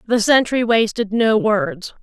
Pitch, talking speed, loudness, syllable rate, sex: 225 Hz, 150 wpm, -17 LUFS, 3.9 syllables/s, female